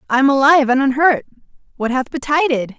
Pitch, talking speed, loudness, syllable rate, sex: 270 Hz, 170 wpm, -15 LUFS, 6.2 syllables/s, female